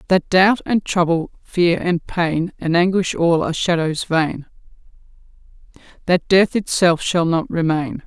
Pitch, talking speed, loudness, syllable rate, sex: 170 Hz, 140 wpm, -18 LUFS, 4.2 syllables/s, female